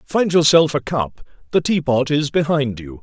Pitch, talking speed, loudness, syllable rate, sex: 140 Hz, 180 wpm, -18 LUFS, 4.6 syllables/s, male